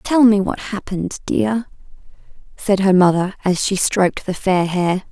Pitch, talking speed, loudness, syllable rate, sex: 195 Hz, 165 wpm, -18 LUFS, 4.5 syllables/s, female